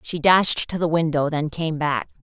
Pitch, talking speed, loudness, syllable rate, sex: 160 Hz, 215 wpm, -21 LUFS, 4.5 syllables/s, female